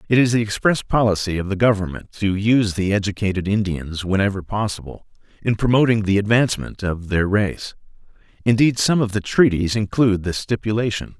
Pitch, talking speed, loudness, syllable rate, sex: 105 Hz, 160 wpm, -19 LUFS, 5.6 syllables/s, male